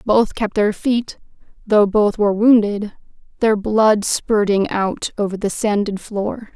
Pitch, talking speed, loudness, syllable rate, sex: 210 Hz, 135 wpm, -18 LUFS, 3.9 syllables/s, female